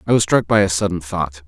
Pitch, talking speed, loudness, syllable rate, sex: 90 Hz, 285 wpm, -18 LUFS, 6.0 syllables/s, male